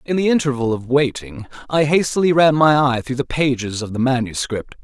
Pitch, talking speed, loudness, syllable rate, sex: 135 Hz, 200 wpm, -18 LUFS, 5.4 syllables/s, male